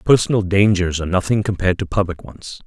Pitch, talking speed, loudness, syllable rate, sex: 95 Hz, 180 wpm, -18 LUFS, 6.4 syllables/s, male